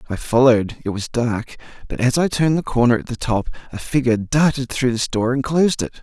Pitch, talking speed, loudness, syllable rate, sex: 125 Hz, 210 wpm, -19 LUFS, 6.1 syllables/s, male